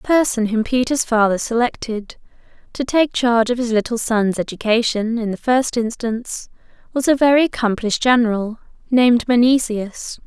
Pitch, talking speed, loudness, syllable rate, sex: 235 Hz, 145 wpm, -18 LUFS, 5.2 syllables/s, female